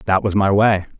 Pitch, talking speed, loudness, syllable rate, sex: 100 Hz, 240 wpm, -16 LUFS, 5.6 syllables/s, male